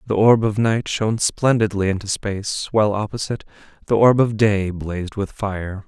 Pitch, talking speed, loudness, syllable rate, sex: 105 Hz, 175 wpm, -20 LUFS, 5.2 syllables/s, male